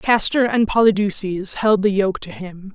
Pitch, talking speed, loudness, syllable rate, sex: 200 Hz, 175 wpm, -18 LUFS, 4.4 syllables/s, female